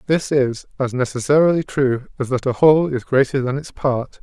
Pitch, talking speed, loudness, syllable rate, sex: 135 Hz, 200 wpm, -18 LUFS, 5.3 syllables/s, male